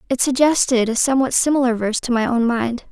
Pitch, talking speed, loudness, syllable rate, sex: 250 Hz, 205 wpm, -18 LUFS, 6.3 syllables/s, female